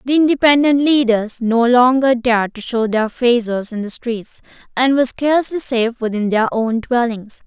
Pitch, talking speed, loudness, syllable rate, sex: 240 Hz, 170 wpm, -16 LUFS, 4.9 syllables/s, female